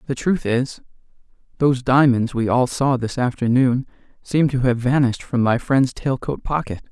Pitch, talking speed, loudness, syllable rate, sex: 130 Hz, 175 wpm, -19 LUFS, 4.9 syllables/s, male